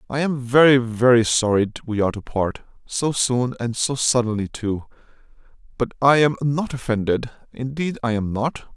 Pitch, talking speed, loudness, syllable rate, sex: 125 Hz, 160 wpm, -20 LUFS, 4.9 syllables/s, male